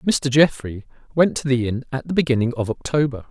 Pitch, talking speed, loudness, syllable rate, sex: 130 Hz, 200 wpm, -20 LUFS, 5.5 syllables/s, male